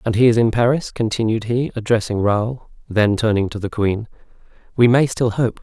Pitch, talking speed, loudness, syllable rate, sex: 115 Hz, 190 wpm, -18 LUFS, 5.2 syllables/s, male